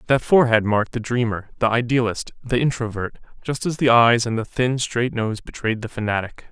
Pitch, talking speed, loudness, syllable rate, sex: 115 Hz, 195 wpm, -21 LUFS, 5.4 syllables/s, male